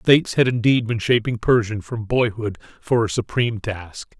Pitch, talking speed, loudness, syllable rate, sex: 115 Hz, 185 wpm, -20 LUFS, 5.1 syllables/s, male